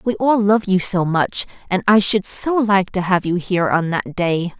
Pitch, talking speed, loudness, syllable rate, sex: 190 Hz, 235 wpm, -18 LUFS, 4.5 syllables/s, female